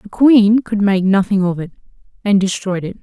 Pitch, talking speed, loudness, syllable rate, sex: 200 Hz, 200 wpm, -14 LUFS, 4.9 syllables/s, female